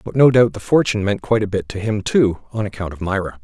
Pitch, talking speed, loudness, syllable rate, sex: 105 Hz, 280 wpm, -18 LUFS, 6.5 syllables/s, male